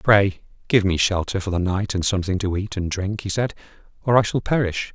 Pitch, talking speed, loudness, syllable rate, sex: 100 Hz, 230 wpm, -22 LUFS, 5.5 syllables/s, male